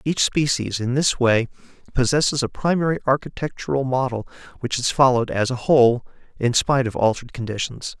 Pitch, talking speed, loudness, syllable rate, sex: 130 Hz, 160 wpm, -21 LUFS, 5.9 syllables/s, male